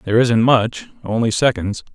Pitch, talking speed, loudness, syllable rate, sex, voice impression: 120 Hz, 125 wpm, -17 LUFS, 5.1 syllables/s, male, masculine, adult-like, slightly thick, slightly cool, sincere, friendly